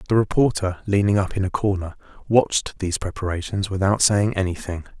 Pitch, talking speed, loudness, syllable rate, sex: 100 Hz, 155 wpm, -21 LUFS, 5.7 syllables/s, male